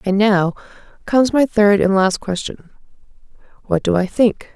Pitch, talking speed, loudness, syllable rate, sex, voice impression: 200 Hz, 160 wpm, -16 LUFS, 4.7 syllables/s, female, feminine, adult-like, slightly cute, friendly, slightly kind